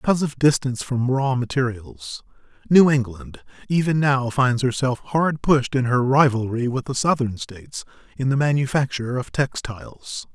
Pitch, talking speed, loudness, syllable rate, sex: 130 Hz, 150 wpm, -21 LUFS, 4.9 syllables/s, male